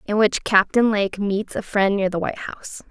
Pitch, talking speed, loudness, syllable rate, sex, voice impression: 200 Hz, 225 wpm, -20 LUFS, 5.1 syllables/s, female, feminine, slightly young, relaxed, weak, slightly dark, soft, muffled, raspy, calm, slightly reassuring, kind, modest